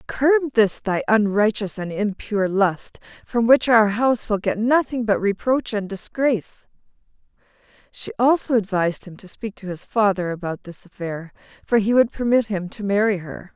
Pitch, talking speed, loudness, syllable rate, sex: 210 Hz, 170 wpm, -21 LUFS, 4.7 syllables/s, female